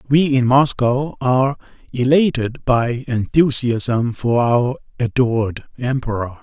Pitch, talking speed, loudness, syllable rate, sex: 125 Hz, 105 wpm, -18 LUFS, 3.8 syllables/s, male